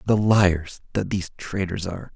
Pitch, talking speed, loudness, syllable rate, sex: 95 Hz, 165 wpm, -23 LUFS, 5.1 syllables/s, male